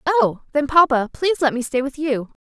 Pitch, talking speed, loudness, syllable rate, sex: 280 Hz, 220 wpm, -19 LUFS, 5.2 syllables/s, female